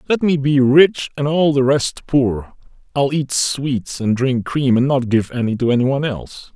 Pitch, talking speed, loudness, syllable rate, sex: 135 Hz, 210 wpm, -17 LUFS, 4.6 syllables/s, male